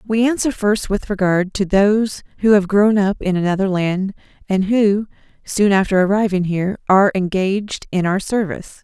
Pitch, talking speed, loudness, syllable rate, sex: 200 Hz, 170 wpm, -17 LUFS, 5.2 syllables/s, female